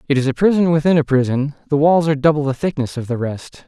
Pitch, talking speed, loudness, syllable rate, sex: 145 Hz, 260 wpm, -17 LUFS, 6.6 syllables/s, male